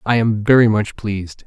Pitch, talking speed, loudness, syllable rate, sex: 105 Hz, 205 wpm, -16 LUFS, 5.2 syllables/s, male